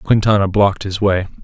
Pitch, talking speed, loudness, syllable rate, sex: 100 Hz, 165 wpm, -15 LUFS, 5.7 syllables/s, male